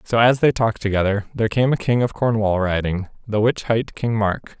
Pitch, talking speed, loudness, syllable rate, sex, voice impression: 110 Hz, 220 wpm, -20 LUFS, 5.5 syllables/s, male, very masculine, very adult-like, middle-aged, very thick, slightly tensed, slightly weak, slightly dark, slightly soft, muffled, fluent, cool, very intellectual, very sincere, very calm, mature, friendly, reassuring, elegant, sweet, kind, very modest